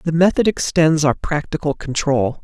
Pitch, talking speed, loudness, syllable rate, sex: 150 Hz, 150 wpm, -18 LUFS, 4.8 syllables/s, male